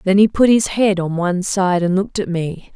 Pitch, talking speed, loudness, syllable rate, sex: 190 Hz, 260 wpm, -17 LUFS, 5.3 syllables/s, female